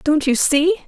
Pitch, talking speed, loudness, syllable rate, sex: 310 Hz, 205 wpm, -16 LUFS, 4.4 syllables/s, female